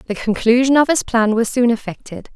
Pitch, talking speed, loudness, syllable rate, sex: 240 Hz, 205 wpm, -16 LUFS, 5.5 syllables/s, female